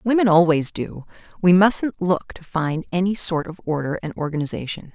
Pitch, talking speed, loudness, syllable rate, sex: 175 Hz, 170 wpm, -21 LUFS, 5.0 syllables/s, female